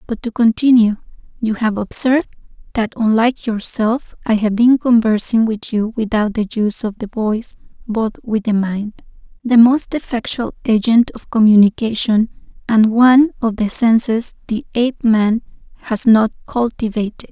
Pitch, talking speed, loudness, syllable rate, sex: 225 Hz, 140 wpm, -16 LUFS, 4.8 syllables/s, female